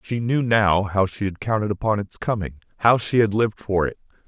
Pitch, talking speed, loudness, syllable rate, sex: 105 Hz, 225 wpm, -21 LUFS, 5.6 syllables/s, male